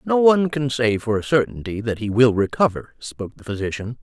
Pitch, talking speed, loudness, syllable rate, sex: 120 Hz, 210 wpm, -20 LUFS, 5.7 syllables/s, male